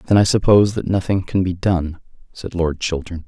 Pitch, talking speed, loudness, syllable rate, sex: 90 Hz, 200 wpm, -18 LUFS, 5.4 syllables/s, male